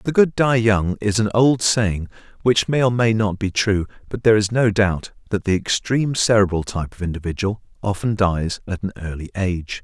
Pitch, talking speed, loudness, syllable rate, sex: 105 Hz, 200 wpm, -20 LUFS, 5.3 syllables/s, male